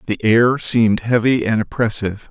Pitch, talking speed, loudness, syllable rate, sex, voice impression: 115 Hz, 155 wpm, -17 LUFS, 5.1 syllables/s, male, very masculine, very adult-like, old, very thick, slightly tensed, slightly weak, slightly dark, soft, clear, fluent, slightly raspy, very cool, intellectual, very sincere, calm, very mature, very friendly, very reassuring, very unique, elegant, slightly wild, sweet, slightly lively, slightly strict, slightly intense, slightly modest